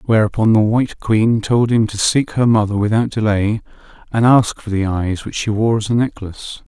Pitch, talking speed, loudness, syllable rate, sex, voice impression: 110 Hz, 205 wpm, -16 LUFS, 5.1 syllables/s, male, masculine, very adult-like, slightly thick, slightly dark, slightly sincere, calm, slightly kind